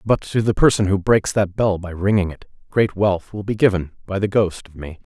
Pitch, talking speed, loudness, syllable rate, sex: 100 Hz, 245 wpm, -19 LUFS, 5.3 syllables/s, male